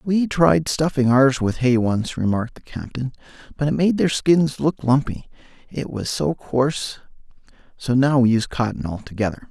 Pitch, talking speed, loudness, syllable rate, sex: 130 Hz, 170 wpm, -20 LUFS, 4.9 syllables/s, male